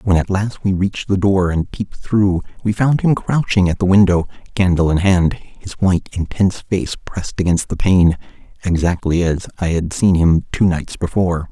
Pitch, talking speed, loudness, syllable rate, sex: 95 Hz, 195 wpm, -17 LUFS, 5.0 syllables/s, male